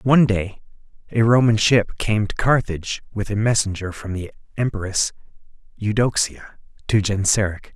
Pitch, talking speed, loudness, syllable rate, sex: 105 Hz, 130 wpm, -20 LUFS, 4.7 syllables/s, male